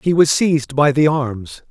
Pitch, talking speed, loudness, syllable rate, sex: 145 Hz, 210 wpm, -16 LUFS, 4.5 syllables/s, male